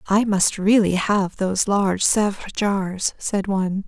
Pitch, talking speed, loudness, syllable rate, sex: 195 Hz, 155 wpm, -20 LUFS, 4.1 syllables/s, female